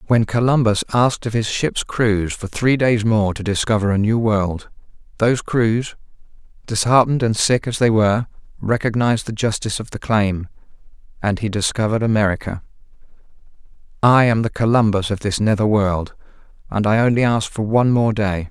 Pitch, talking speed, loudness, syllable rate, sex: 110 Hz, 160 wpm, -18 LUFS, 5.4 syllables/s, male